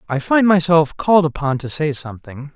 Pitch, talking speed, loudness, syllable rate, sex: 155 Hz, 190 wpm, -16 LUFS, 5.5 syllables/s, male